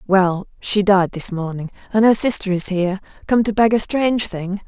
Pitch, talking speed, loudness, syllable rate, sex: 200 Hz, 190 wpm, -18 LUFS, 5.1 syllables/s, female